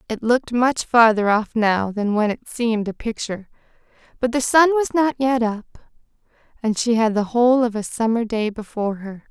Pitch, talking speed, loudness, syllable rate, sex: 230 Hz, 195 wpm, -19 LUFS, 5.4 syllables/s, female